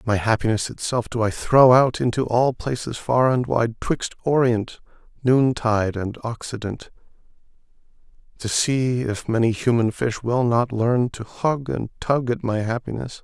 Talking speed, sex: 155 wpm, male